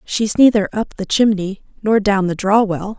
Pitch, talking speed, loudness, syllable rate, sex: 205 Hz, 200 wpm, -16 LUFS, 4.5 syllables/s, female